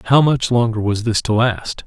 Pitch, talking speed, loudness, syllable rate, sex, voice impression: 115 Hz, 225 wpm, -17 LUFS, 4.8 syllables/s, male, masculine, middle-aged, slightly relaxed, powerful, hard, slightly muffled, raspy, cool, calm, mature, friendly, wild, lively, slightly kind